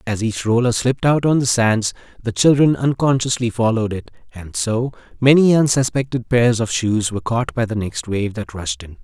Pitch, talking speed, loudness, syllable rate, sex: 115 Hz, 195 wpm, -18 LUFS, 5.2 syllables/s, male